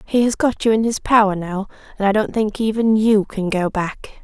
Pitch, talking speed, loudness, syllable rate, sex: 210 Hz, 240 wpm, -18 LUFS, 5.0 syllables/s, female